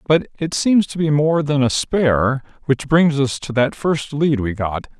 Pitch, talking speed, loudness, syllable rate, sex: 145 Hz, 205 wpm, -18 LUFS, 4.4 syllables/s, male